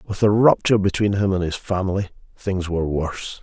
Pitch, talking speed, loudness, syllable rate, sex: 95 Hz, 195 wpm, -20 LUFS, 6.0 syllables/s, male